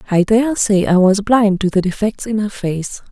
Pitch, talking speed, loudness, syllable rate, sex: 205 Hz, 210 wpm, -15 LUFS, 4.9 syllables/s, female